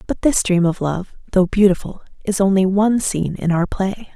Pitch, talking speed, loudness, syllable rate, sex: 190 Hz, 200 wpm, -18 LUFS, 5.3 syllables/s, female